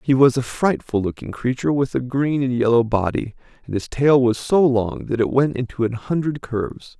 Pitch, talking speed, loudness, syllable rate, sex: 125 Hz, 215 wpm, -20 LUFS, 5.2 syllables/s, male